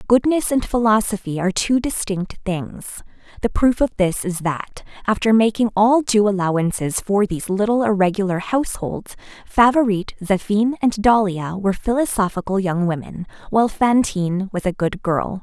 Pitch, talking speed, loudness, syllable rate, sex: 205 Hz, 145 wpm, -19 LUFS, 5.1 syllables/s, female